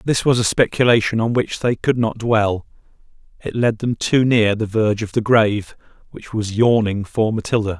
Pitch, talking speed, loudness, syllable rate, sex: 110 Hz, 185 wpm, -18 LUFS, 5.0 syllables/s, male